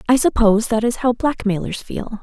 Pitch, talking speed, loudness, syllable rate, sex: 230 Hz, 190 wpm, -18 LUFS, 5.3 syllables/s, female